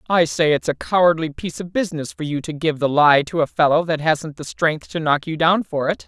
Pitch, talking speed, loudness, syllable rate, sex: 160 Hz, 265 wpm, -19 LUFS, 5.6 syllables/s, female